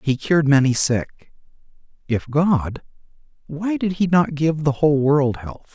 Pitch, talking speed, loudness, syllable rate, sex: 145 Hz, 155 wpm, -19 LUFS, 4.3 syllables/s, male